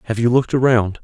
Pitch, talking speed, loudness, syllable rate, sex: 120 Hz, 235 wpm, -16 LUFS, 7.1 syllables/s, male